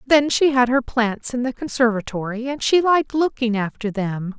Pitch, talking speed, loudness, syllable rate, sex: 245 Hz, 190 wpm, -20 LUFS, 4.9 syllables/s, female